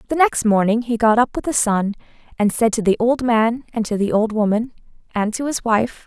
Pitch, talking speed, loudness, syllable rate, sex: 225 Hz, 235 wpm, -18 LUFS, 5.3 syllables/s, female